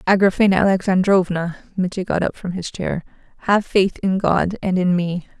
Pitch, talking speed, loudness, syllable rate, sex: 185 Hz, 165 wpm, -19 LUFS, 5.1 syllables/s, female